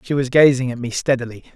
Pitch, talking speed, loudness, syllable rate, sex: 130 Hz, 230 wpm, -17 LUFS, 6.6 syllables/s, male